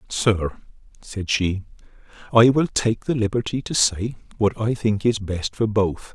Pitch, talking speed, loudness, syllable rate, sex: 105 Hz, 165 wpm, -21 LUFS, 4.1 syllables/s, male